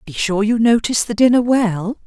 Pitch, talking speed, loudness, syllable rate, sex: 220 Hz, 205 wpm, -16 LUFS, 5.3 syllables/s, female